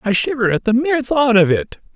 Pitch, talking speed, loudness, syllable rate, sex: 230 Hz, 245 wpm, -16 LUFS, 5.8 syllables/s, male